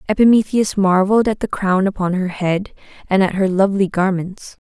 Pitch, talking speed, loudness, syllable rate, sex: 195 Hz, 165 wpm, -17 LUFS, 5.4 syllables/s, female